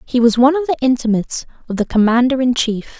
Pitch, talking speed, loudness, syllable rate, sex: 250 Hz, 220 wpm, -15 LUFS, 7.3 syllables/s, female